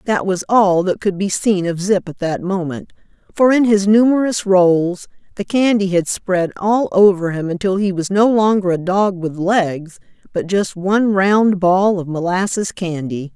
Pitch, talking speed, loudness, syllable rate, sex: 190 Hz, 185 wpm, -16 LUFS, 4.3 syllables/s, female